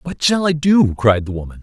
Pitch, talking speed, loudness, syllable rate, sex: 135 Hz, 260 wpm, -15 LUFS, 5.2 syllables/s, male